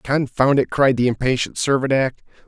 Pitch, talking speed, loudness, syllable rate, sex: 130 Hz, 145 wpm, -19 LUFS, 5.2 syllables/s, male